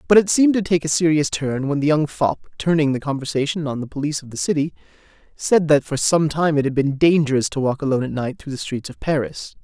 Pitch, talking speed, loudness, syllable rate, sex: 150 Hz, 250 wpm, -20 LUFS, 6.2 syllables/s, male